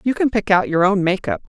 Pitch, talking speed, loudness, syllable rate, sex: 205 Hz, 265 wpm, -18 LUFS, 6.0 syllables/s, female